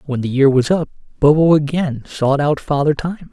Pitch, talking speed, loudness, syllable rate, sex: 145 Hz, 200 wpm, -16 LUFS, 5.0 syllables/s, male